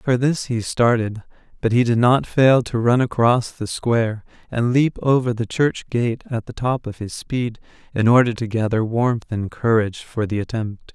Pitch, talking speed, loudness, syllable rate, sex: 120 Hz, 195 wpm, -20 LUFS, 4.6 syllables/s, male